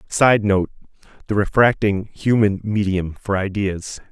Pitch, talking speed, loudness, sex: 100 Hz, 100 wpm, -19 LUFS, male